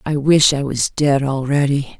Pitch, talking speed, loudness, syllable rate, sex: 140 Hz, 180 wpm, -16 LUFS, 4.3 syllables/s, female